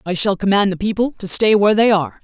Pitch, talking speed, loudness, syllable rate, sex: 205 Hz, 270 wpm, -16 LUFS, 6.6 syllables/s, female